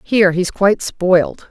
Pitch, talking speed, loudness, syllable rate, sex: 190 Hz, 160 wpm, -15 LUFS, 5.0 syllables/s, female